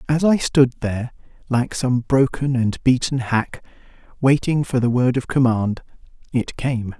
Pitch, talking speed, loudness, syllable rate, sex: 125 Hz, 155 wpm, -20 LUFS, 4.3 syllables/s, male